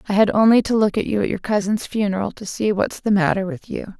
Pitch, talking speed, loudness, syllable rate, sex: 205 Hz, 270 wpm, -19 LUFS, 6.1 syllables/s, female